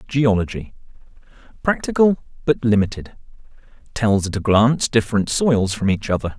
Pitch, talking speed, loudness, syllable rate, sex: 115 Hz, 115 wpm, -19 LUFS, 5.4 syllables/s, male